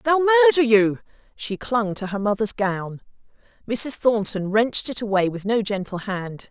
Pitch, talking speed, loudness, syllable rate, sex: 220 Hz, 165 wpm, -21 LUFS, 4.7 syllables/s, female